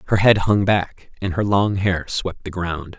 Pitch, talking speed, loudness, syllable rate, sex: 95 Hz, 220 wpm, -20 LUFS, 4.1 syllables/s, male